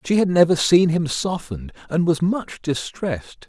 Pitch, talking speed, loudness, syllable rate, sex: 165 Hz, 170 wpm, -20 LUFS, 4.7 syllables/s, male